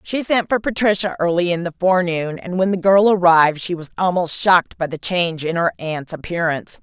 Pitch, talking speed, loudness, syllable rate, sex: 175 Hz, 210 wpm, -18 LUFS, 5.7 syllables/s, female